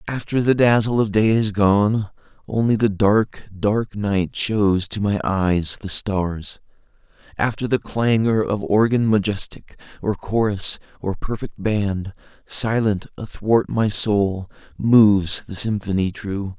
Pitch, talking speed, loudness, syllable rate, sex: 105 Hz, 135 wpm, -20 LUFS, 3.7 syllables/s, male